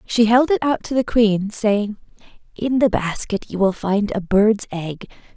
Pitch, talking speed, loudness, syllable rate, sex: 215 Hz, 190 wpm, -19 LUFS, 4.2 syllables/s, female